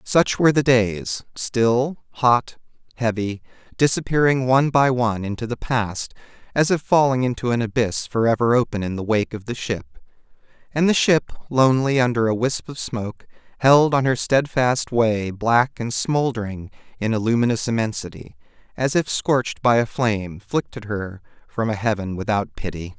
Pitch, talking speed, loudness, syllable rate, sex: 120 Hz, 165 wpm, -21 LUFS, 5.0 syllables/s, male